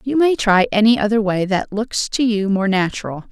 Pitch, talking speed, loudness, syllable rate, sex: 210 Hz, 215 wpm, -17 LUFS, 5.4 syllables/s, female